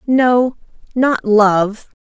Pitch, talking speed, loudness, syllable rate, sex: 230 Hz, 90 wpm, -14 LUFS, 2.1 syllables/s, female